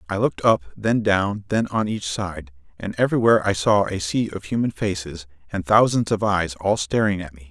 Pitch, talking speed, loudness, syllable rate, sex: 95 Hz, 210 wpm, -21 LUFS, 5.3 syllables/s, male